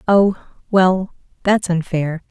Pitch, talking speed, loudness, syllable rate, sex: 180 Hz, 105 wpm, -18 LUFS, 3.5 syllables/s, female